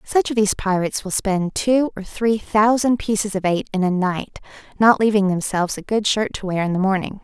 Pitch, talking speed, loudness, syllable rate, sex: 205 Hz, 225 wpm, -19 LUFS, 5.5 syllables/s, female